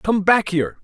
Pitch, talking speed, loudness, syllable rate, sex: 190 Hz, 215 wpm, -18 LUFS, 5.1 syllables/s, male